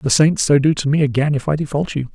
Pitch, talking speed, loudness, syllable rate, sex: 145 Hz, 310 wpm, -17 LUFS, 6.2 syllables/s, male